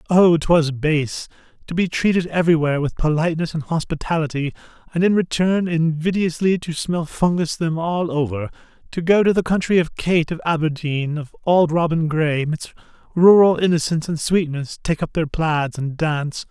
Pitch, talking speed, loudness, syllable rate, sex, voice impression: 160 Hz, 160 wpm, -19 LUFS, 5.0 syllables/s, male, very masculine, very adult-like, old, tensed, powerful, bright, soft, clear, fluent, slightly raspy, very cool, very intellectual, very sincere, slightly calm, very mature, friendly, reassuring, very unique, elegant, very wild, sweet, very lively, intense